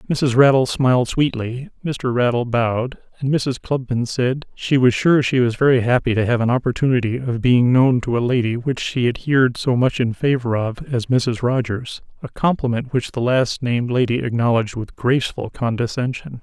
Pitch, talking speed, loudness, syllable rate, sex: 125 Hz, 185 wpm, -19 LUFS, 5.0 syllables/s, male